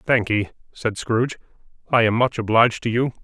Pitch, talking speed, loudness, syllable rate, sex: 115 Hz, 165 wpm, -20 LUFS, 5.8 syllables/s, male